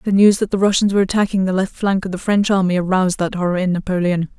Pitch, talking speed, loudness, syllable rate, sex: 190 Hz, 260 wpm, -17 LUFS, 6.9 syllables/s, female